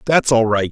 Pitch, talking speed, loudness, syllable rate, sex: 120 Hz, 250 wpm, -15 LUFS, 5.0 syllables/s, male